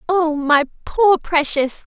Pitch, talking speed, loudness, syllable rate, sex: 320 Hz, 125 wpm, -17 LUFS, 3.4 syllables/s, female